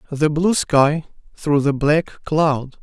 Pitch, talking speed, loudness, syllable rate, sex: 150 Hz, 150 wpm, -18 LUFS, 3.3 syllables/s, male